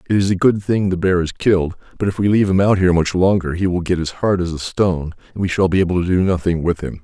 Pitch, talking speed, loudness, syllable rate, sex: 90 Hz, 305 wpm, -17 LUFS, 6.7 syllables/s, male